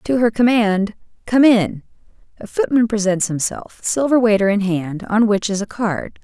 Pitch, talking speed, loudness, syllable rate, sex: 210 Hz, 175 wpm, -17 LUFS, 4.6 syllables/s, female